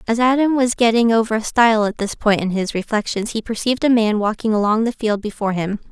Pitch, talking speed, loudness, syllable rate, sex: 220 Hz, 235 wpm, -18 LUFS, 6.2 syllables/s, female